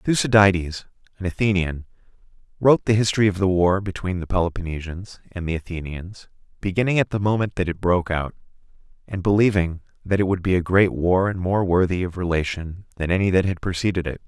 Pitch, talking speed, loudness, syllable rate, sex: 95 Hz, 180 wpm, -21 LUFS, 6.0 syllables/s, male